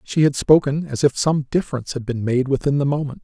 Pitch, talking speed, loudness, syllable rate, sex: 140 Hz, 240 wpm, -19 LUFS, 6.1 syllables/s, male